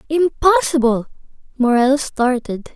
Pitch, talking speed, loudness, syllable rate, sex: 255 Hz, 65 wpm, -16 LUFS, 4.0 syllables/s, female